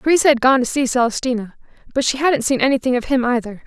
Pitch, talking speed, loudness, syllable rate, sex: 255 Hz, 230 wpm, -17 LUFS, 6.7 syllables/s, female